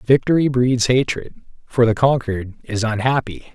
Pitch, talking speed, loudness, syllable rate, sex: 120 Hz, 135 wpm, -18 LUFS, 4.6 syllables/s, male